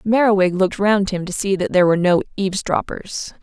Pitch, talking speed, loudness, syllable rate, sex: 195 Hz, 195 wpm, -18 LUFS, 6.0 syllables/s, female